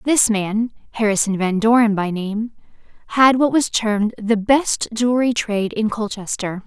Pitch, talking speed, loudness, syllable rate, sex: 220 Hz, 135 wpm, -18 LUFS, 4.6 syllables/s, female